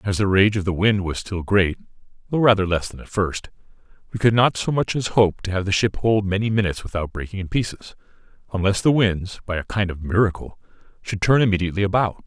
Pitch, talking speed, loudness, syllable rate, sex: 100 Hz, 220 wpm, -21 LUFS, 6.0 syllables/s, male